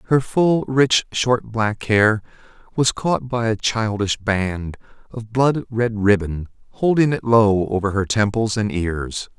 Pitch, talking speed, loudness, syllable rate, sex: 110 Hz, 155 wpm, -19 LUFS, 3.7 syllables/s, male